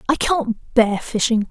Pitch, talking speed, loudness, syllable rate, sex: 235 Hz, 160 wpm, -19 LUFS, 3.8 syllables/s, female